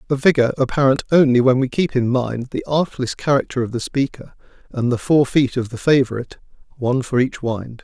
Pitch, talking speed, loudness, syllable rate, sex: 130 Hz, 200 wpm, -18 LUFS, 5.7 syllables/s, male